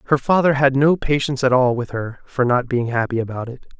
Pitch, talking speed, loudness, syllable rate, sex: 130 Hz, 235 wpm, -19 LUFS, 5.8 syllables/s, male